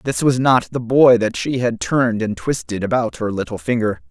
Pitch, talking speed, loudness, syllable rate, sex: 115 Hz, 220 wpm, -18 LUFS, 5.1 syllables/s, male